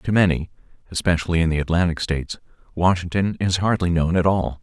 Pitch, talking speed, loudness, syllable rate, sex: 85 Hz, 170 wpm, -21 LUFS, 6.0 syllables/s, male